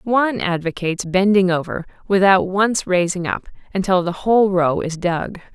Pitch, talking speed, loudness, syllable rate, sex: 185 Hz, 150 wpm, -18 LUFS, 5.0 syllables/s, female